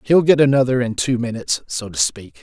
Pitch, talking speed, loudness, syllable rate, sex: 125 Hz, 200 wpm, -18 LUFS, 5.7 syllables/s, male